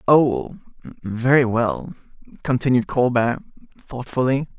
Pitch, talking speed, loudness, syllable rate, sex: 130 Hz, 80 wpm, -20 LUFS, 3.7 syllables/s, male